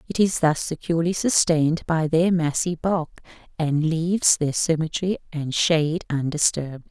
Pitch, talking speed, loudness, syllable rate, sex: 160 Hz, 140 wpm, -22 LUFS, 4.8 syllables/s, female